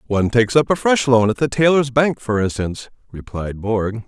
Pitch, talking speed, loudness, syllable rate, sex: 120 Hz, 205 wpm, -18 LUFS, 5.4 syllables/s, male